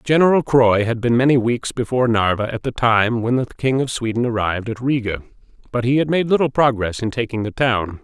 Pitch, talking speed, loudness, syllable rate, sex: 120 Hz, 215 wpm, -18 LUFS, 5.8 syllables/s, male